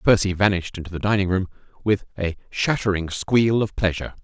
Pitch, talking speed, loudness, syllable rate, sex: 95 Hz, 170 wpm, -22 LUFS, 6.1 syllables/s, male